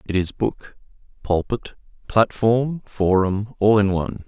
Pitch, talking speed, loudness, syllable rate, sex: 105 Hz, 125 wpm, -21 LUFS, 4.0 syllables/s, male